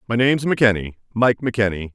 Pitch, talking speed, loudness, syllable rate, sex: 110 Hz, 125 wpm, -19 LUFS, 7.9 syllables/s, male